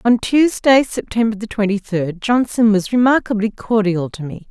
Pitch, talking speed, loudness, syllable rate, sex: 215 Hz, 145 wpm, -16 LUFS, 4.5 syllables/s, female